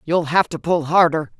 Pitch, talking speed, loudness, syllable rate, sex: 160 Hz, 215 wpm, -18 LUFS, 4.8 syllables/s, female